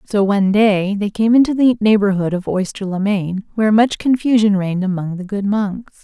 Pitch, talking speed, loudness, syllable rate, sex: 205 Hz, 200 wpm, -16 LUFS, 5.2 syllables/s, female